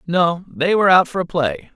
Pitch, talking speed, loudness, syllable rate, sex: 170 Hz, 240 wpm, -17 LUFS, 5.1 syllables/s, male